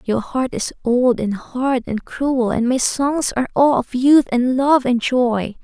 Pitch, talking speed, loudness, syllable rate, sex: 250 Hz, 200 wpm, -18 LUFS, 3.8 syllables/s, female